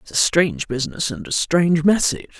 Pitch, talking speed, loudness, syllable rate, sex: 170 Hz, 200 wpm, -19 LUFS, 6.0 syllables/s, female